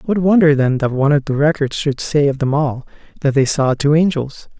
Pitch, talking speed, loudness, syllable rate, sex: 145 Hz, 235 wpm, -16 LUFS, 5.5 syllables/s, male